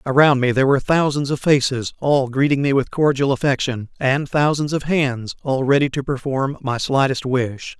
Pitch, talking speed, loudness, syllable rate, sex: 135 Hz, 185 wpm, -19 LUFS, 5.0 syllables/s, male